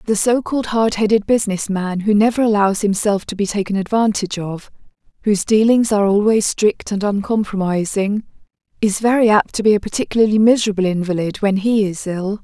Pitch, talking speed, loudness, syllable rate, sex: 205 Hz, 170 wpm, -17 LUFS, 5.8 syllables/s, female